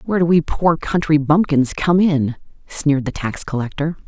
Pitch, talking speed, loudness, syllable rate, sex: 155 Hz, 175 wpm, -18 LUFS, 5.0 syllables/s, female